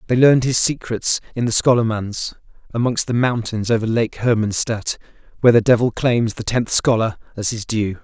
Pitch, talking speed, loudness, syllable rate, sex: 115 Hz, 170 wpm, -18 LUFS, 5.4 syllables/s, male